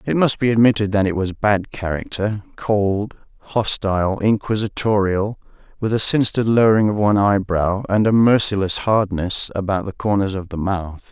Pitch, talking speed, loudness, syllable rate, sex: 100 Hz, 155 wpm, -19 LUFS, 5.0 syllables/s, male